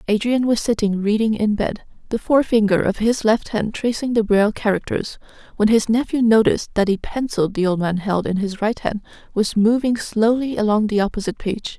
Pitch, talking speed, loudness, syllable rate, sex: 215 Hz, 195 wpm, -19 LUFS, 5.4 syllables/s, female